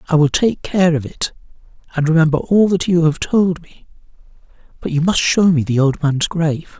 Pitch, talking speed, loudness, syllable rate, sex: 165 Hz, 205 wpm, -16 LUFS, 5.1 syllables/s, male